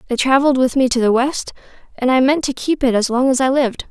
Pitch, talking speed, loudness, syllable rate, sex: 260 Hz, 275 wpm, -16 LUFS, 6.4 syllables/s, female